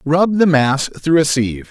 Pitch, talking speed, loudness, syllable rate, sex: 150 Hz, 210 wpm, -15 LUFS, 4.4 syllables/s, male